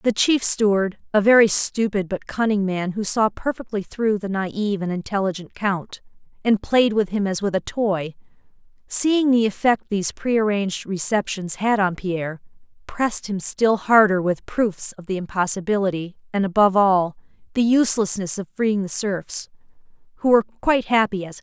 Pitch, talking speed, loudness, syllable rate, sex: 205 Hz, 170 wpm, -21 LUFS, 5.0 syllables/s, female